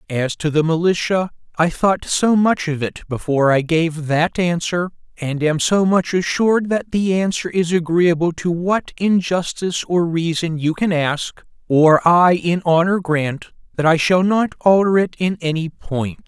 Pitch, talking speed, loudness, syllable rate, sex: 170 Hz, 175 wpm, -18 LUFS, 4.4 syllables/s, male